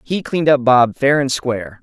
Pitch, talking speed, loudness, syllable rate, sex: 135 Hz, 230 wpm, -15 LUFS, 5.2 syllables/s, male